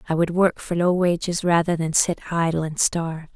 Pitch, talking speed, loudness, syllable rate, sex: 170 Hz, 215 wpm, -21 LUFS, 5.4 syllables/s, female